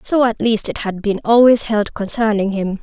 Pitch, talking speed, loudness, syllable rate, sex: 215 Hz, 210 wpm, -16 LUFS, 4.8 syllables/s, female